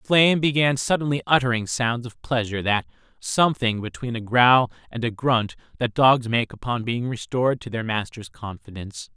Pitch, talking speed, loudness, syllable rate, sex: 120 Hz, 165 wpm, -22 LUFS, 5.2 syllables/s, male